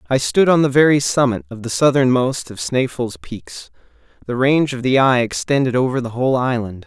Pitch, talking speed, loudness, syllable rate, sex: 125 Hz, 190 wpm, -17 LUFS, 5.5 syllables/s, male